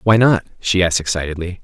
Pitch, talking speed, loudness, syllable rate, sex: 95 Hz, 185 wpm, -17 LUFS, 6.5 syllables/s, male